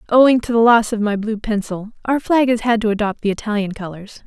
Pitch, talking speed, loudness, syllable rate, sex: 220 Hz, 240 wpm, -17 LUFS, 5.9 syllables/s, female